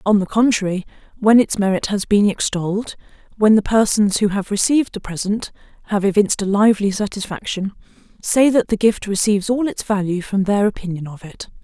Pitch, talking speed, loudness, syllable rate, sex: 205 Hz, 180 wpm, -18 LUFS, 5.7 syllables/s, female